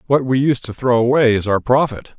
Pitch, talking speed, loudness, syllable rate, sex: 125 Hz, 245 wpm, -16 LUFS, 5.4 syllables/s, male